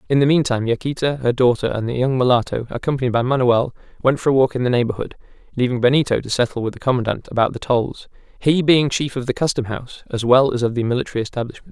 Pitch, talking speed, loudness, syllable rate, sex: 125 Hz, 220 wpm, -19 LUFS, 6.9 syllables/s, male